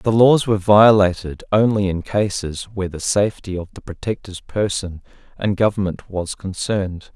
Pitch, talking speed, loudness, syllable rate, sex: 100 Hz, 150 wpm, -19 LUFS, 5.0 syllables/s, male